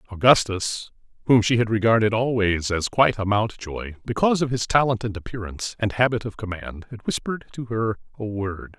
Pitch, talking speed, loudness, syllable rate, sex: 110 Hz, 180 wpm, -23 LUFS, 5.5 syllables/s, male